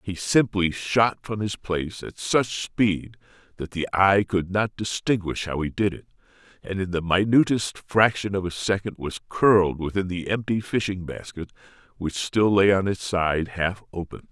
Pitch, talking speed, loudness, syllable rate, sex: 95 Hz, 175 wpm, -24 LUFS, 4.5 syllables/s, male